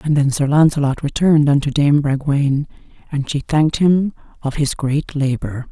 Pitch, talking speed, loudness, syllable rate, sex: 145 Hz, 170 wpm, -17 LUFS, 5.1 syllables/s, female